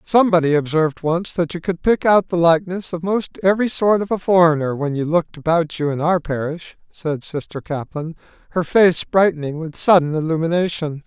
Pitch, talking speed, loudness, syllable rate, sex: 165 Hz, 185 wpm, -18 LUFS, 5.4 syllables/s, male